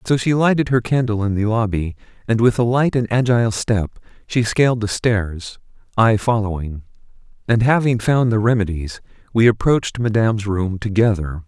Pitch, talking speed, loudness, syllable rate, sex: 110 Hz, 160 wpm, -18 LUFS, 5.1 syllables/s, male